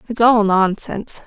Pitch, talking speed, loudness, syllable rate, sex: 210 Hz, 145 wpm, -16 LUFS, 4.7 syllables/s, female